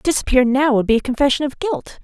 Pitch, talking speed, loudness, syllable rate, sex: 270 Hz, 265 wpm, -17 LUFS, 6.6 syllables/s, female